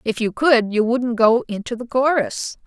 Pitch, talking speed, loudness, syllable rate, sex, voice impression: 235 Hz, 205 wpm, -19 LUFS, 4.4 syllables/s, female, gender-neutral, adult-like, clear, slightly refreshing, slightly unique, kind